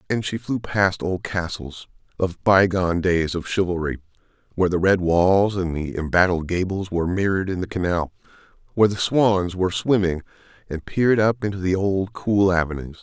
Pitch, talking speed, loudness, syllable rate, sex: 95 Hz, 175 wpm, -21 LUFS, 5.2 syllables/s, male